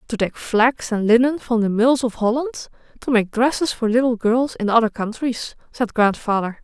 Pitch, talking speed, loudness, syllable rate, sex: 235 Hz, 190 wpm, -19 LUFS, 4.8 syllables/s, female